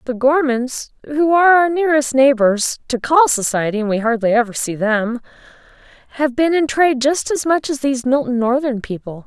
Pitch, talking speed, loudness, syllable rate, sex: 265 Hz, 175 wpm, -16 LUFS, 4.0 syllables/s, female